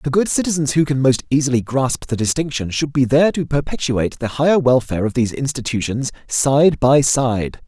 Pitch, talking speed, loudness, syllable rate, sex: 130 Hz, 190 wpm, -17 LUFS, 5.6 syllables/s, male